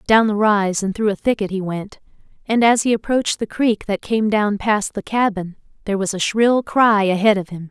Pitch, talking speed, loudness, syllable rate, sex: 210 Hz, 225 wpm, -18 LUFS, 5.1 syllables/s, female